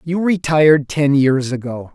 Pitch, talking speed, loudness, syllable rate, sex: 145 Hz, 155 wpm, -15 LUFS, 4.4 syllables/s, male